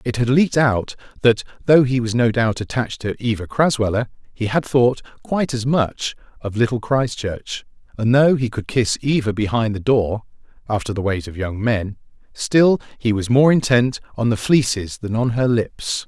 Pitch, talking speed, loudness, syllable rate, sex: 120 Hz, 185 wpm, -19 LUFS, 4.8 syllables/s, male